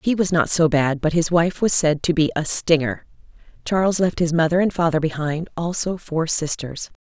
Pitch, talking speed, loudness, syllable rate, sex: 165 Hz, 205 wpm, -20 LUFS, 5.0 syllables/s, female